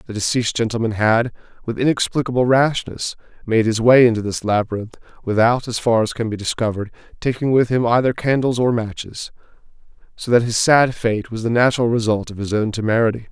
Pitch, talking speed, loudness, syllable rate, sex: 115 Hz, 180 wpm, -18 LUFS, 5.9 syllables/s, male